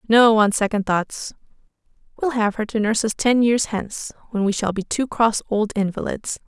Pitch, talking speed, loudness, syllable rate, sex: 220 Hz, 195 wpm, -21 LUFS, 5.1 syllables/s, female